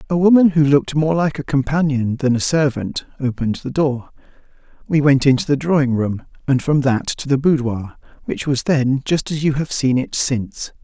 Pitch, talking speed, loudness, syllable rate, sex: 140 Hz, 200 wpm, -18 LUFS, 5.2 syllables/s, male